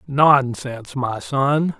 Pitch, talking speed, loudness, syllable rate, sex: 130 Hz, 100 wpm, -19 LUFS, 3.0 syllables/s, male